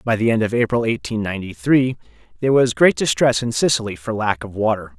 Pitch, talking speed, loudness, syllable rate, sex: 115 Hz, 215 wpm, -19 LUFS, 6.1 syllables/s, male